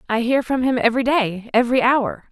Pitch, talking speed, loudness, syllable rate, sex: 245 Hz, 180 wpm, -19 LUFS, 5.8 syllables/s, female